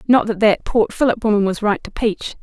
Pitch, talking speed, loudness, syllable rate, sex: 215 Hz, 245 wpm, -18 LUFS, 5.4 syllables/s, female